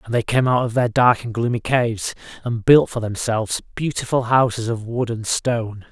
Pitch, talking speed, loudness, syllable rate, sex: 120 Hz, 205 wpm, -20 LUFS, 5.2 syllables/s, male